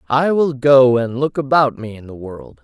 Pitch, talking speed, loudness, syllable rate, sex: 125 Hz, 230 wpm, -15 LUFS, 4.5 syllables/s, male